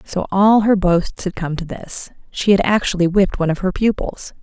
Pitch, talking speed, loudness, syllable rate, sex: 190 Hz, 215 wpm, -18 LUFS, 5.2 syllables/s, female